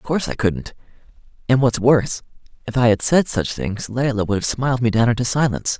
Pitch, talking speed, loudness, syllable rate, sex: 120 Hz, 215 wpm, -19 LUFS, 6.1 syllables/s, male